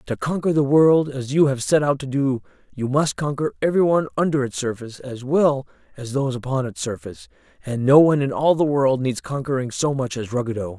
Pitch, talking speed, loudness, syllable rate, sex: 130 Hz, 210 wpm, -20 LUFS, 5.8 syllables/s, male